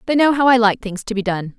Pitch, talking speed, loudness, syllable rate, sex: 225 Hz, 340 wpm, -17 LUFS, 6.3 syllables/s, female